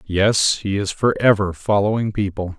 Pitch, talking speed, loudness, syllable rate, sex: 100 Hz, 140 wpm, -19 LUFS, 4.5 syllables/s, male